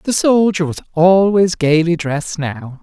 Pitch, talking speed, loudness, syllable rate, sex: 170 Hz, 150 wpm, -15 LUFS, 4.2 syllables/s, male